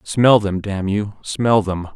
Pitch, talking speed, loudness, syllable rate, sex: 100 Hz, 185 wpm, -18 LUFS, 3.5 syllables/s, male